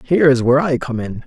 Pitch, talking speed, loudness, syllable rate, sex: 135 Hz, 285 wpm, -16 LUFS, 6.8 syllables/s, male